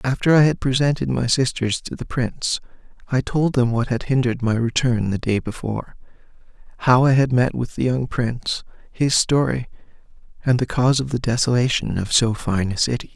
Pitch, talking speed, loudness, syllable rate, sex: 125 Hz, 185 wpm, -20 LUFS, 5.5 syllables/s, male